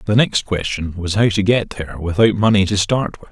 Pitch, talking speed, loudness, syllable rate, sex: 100 Hz, 235 wpm, -17 LUFS, 5.4 syllables/s, male